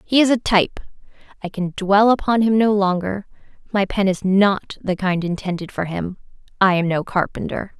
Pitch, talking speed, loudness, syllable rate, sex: 195 Hz, 185 wpm, -19 LUFS, 5.0 syllables/s, female